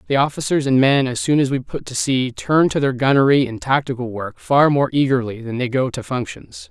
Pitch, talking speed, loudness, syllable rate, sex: 130 Hz, 235 wpm, -18 LUFS, 5.4 syllables/s, male